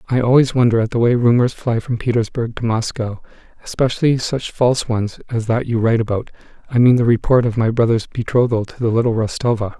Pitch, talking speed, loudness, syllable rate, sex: 115 Hz, 195 wpm, -17 LUFS, 6.0 syllables/s, male